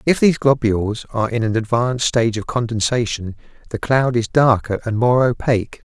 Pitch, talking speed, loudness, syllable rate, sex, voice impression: 120 Hz, 175 wpm, -18 LUFS, 5.7 syllables/s, male, masculine, adult-like, slightly middle-aged, slightly thick, slightly relaxed, slightly weak, slightly bright, very soft, slightly clear, fluent, slightly raspy, cool, very intellectual, slightly refreshing, sincere, very calm, slightly mature, friendly, very reassuring, elegant, slightly sweet, slightly lively, very kind, modest